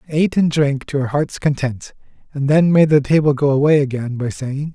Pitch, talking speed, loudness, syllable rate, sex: 145 Hz, 225 wpm, -17 LUFS, 5.4 syllables/s, male